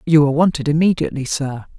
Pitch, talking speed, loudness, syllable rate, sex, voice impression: 150 Hz, 170 wpm, -17 LUFS, 7.1 syllables/s, female, feminine, middle-aged, tensed, slightly powerful, hard, slightly raspy, intellectual, calm, reassuring, elegant, slightly strict